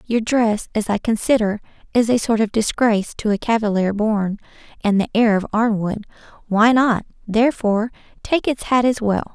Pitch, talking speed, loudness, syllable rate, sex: 220 Hz, 175 wpm, -19 LUFS, 5.1 syllables/s, female